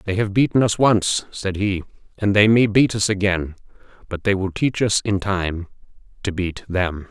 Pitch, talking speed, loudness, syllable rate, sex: 100 Hz, 195 wpm, -20 LUFS, 4.6 syllables/s, male